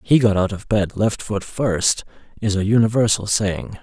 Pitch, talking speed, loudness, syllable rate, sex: 105 Hz, 190 wpm, -19 LUFS, 4.5 syllables/s, male